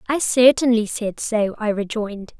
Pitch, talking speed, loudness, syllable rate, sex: 220 Hz, 150 wpm, -19 LUFS, 4.7 syllables/s, female